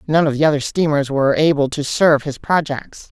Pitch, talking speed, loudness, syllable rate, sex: 145 Hz, 205 wpm, -17 LUFS, 5.7 syllables/s, female